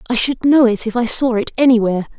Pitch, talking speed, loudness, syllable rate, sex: 235 Hz, 250 wpm, -15 LUFS, 6.5 syllables/s, female